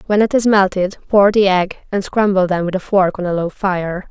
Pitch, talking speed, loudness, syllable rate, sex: 190 Hz, 250 wpm, -16 LUFS, 5.1 syllables/s, female